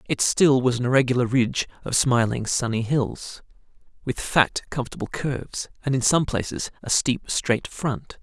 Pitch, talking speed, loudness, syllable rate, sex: 125 Hz, 160 wpm, -23 LUFS, 4.7 syllables/s, male